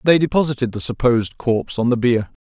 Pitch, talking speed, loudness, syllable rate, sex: 125 Hz, 200 wpm, -19 LUFS, 6.2 syllables/s, male